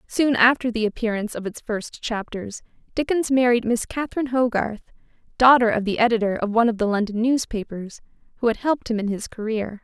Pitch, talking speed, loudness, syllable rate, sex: 230 Hz, 185 wpm, -22 LUFS, 6.0 syllables/s, female